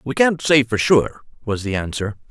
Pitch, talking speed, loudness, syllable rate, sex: 125 Hz, 210 wpm, -18 LUFS, 4.8 syllables/s, male